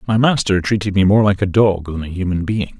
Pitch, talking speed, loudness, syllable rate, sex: 100 Hz, 260 wpm, -16 LUFS, 5.7 syllables/s, male